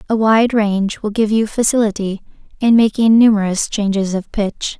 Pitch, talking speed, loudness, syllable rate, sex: 215 Hz, 165 wpm, -15 LUFS, 5.0 syllables/s, female